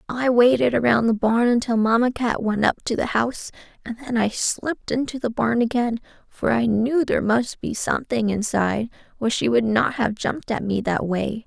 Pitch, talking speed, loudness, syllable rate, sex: 230 Hz, 205 wpm, -21 LUFS, 5.2 syllables/s, female